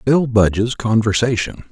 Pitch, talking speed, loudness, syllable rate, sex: 115 Hz, 105 wpm, -17 LUFS, 4.4 syllables/s, male